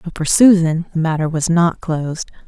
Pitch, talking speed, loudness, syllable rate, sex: 165 Hz, 195 wpm, -16 LUFS, 5.1 syllables/s, female